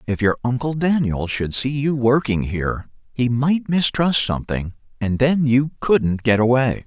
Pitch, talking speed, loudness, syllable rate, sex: 125 Hz, 165 wpm, -19 LUFS, 4.5 syllables/s, male